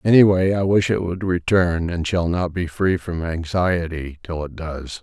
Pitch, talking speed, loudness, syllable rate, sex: 85 Hz, 205 wpm, -21 LUFS, 4.3 syllables/s, male